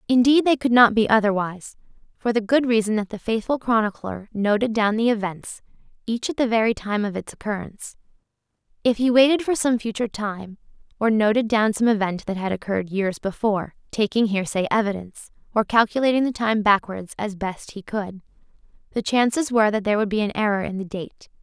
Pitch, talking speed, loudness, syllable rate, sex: 215 Hz, 190 wpm, -22 LUFS, 5.8 syllables/s, female